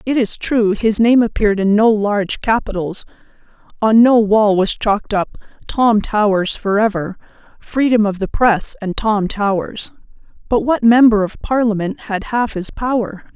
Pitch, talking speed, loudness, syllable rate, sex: 215 Hz, 155 wpm, -16 LUFS, 4.6 syllables/s, female